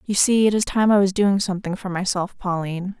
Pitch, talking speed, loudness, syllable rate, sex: 190 Hz, 240 wpm, -20 LUFS, 5.9 syllables/s, female